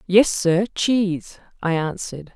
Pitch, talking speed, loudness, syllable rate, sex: 185 Hz, 125 wpm, -21 LUFS, 4.1 syllables/s, female